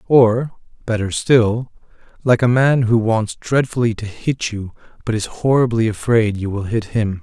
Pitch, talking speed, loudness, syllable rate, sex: 115 Hz, 165 wpm, -18 LUFS, 4.4 syllables/s, male